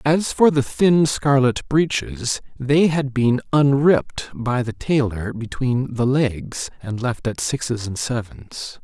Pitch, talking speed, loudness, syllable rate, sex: 130 Hz, 150 wpm, -20 LUFS, 3.5 syllables/s, male